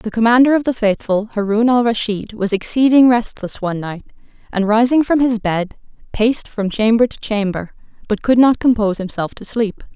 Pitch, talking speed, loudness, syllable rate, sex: 220 Hz, 180 wpm, -16 LUFS, 5.3 syllables/s, female